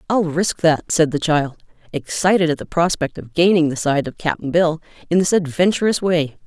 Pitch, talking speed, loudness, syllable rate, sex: 160 Hz, 195 wpm, -18 LUFS, 5.1 syllables/s, female